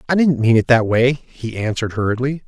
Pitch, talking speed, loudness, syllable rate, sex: 125 Hz, 220 wpm, -17 LUFS, 5.7 syllables/s, male